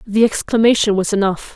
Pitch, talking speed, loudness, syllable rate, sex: 210 Hz, 155 wpm, -16 LUFS, 5.6 syllables/s, female